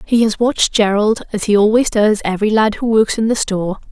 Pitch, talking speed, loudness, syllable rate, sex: 215 Hz, 230 wpm, -15 LUFS, 5.9 syllables/s, female